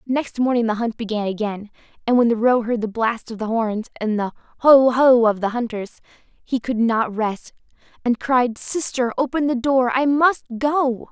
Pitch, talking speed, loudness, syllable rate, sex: 240 Hz, 195 wpm, -20 LUFS, 4.6 syllables/s, female